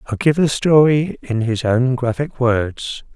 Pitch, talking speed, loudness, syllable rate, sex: 125 Hz, 170 wpm, -17 LUFS, 3.9 syllables/s, male